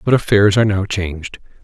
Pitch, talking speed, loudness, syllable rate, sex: 100 Hz, 185 wpm, -15 LUFS, 6.0 syllables/s, male